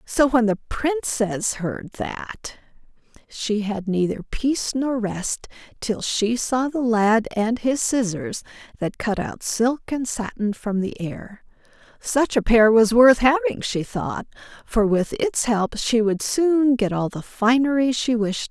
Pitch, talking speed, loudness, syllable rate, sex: 230 Hz, 165 wpm, -21 LUFS, 3.8 syllables/s, female